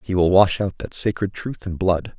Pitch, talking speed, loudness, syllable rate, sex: 95 Hz, 245 wpm, -21 LUFS, 5.1 syllables/s, male